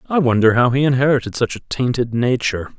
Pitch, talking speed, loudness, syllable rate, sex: 125 Hz, 195 wpm, -17 LUFS, 6.2 syllables/s, male